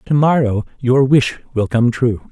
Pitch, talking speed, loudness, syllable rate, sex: 125 Hz, 155 wpm, -16 LUFS, 4.3 syllables/s, male